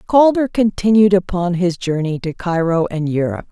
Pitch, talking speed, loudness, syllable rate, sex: 185 Hz, 155 wpm, -16 LUFS, 5.0 syllables/s, female